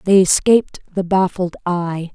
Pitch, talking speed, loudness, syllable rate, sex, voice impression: 180 Hz, 140 wpm, -17 LUFS, 4.2 syllables/s, female, feminine, adult-like, relaxed, slightly powerful, slightly hard, fluent, raspy, intellectual, calm, elegant, sharp